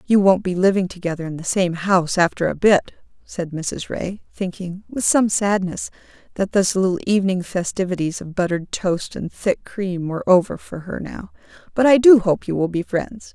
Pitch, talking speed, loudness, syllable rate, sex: 190 Hz, 190 wpm, -20 LUFS, 5.2 syllables/s, female